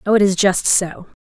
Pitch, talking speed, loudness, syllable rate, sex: 190 Hz, 245 wpm, -16 LUFS, 5.2 syllables/s, female